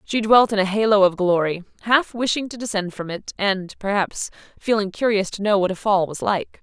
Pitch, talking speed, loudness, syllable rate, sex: 205 Hz, 215 wpm, -20 LUFS, 5.2 syllables/s, female